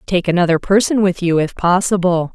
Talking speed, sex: 180 wpm, female